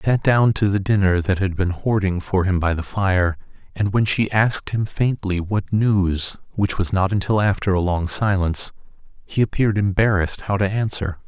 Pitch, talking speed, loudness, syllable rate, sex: 100 Hz, 195 wpm, -20 LUFS, 4.2 syllables/s, male